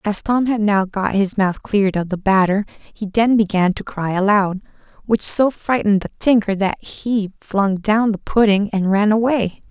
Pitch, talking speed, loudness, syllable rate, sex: 205 Hz, 190 wpm, -18 LUFS, 4.5 syllables/s, female